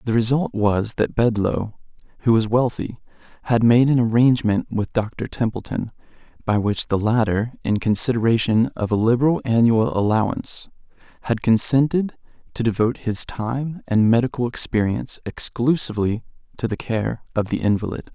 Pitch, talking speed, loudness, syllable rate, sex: 115 Hz, 140 wpm, -20 LUFS, 5.1 syllables/s, male